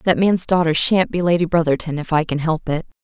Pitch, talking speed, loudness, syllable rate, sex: 165 Hz, 235 wpm, -18 LUFS, 5.6 syllables/s, female